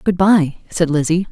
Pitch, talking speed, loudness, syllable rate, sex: 175 Hz, 185 wpm, -16 LUFS, 4.5 syllables/s, female